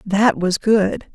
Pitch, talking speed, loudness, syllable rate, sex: 200 Hz, 155 wpm, -17 LUFS, 2.9 syllables/s, female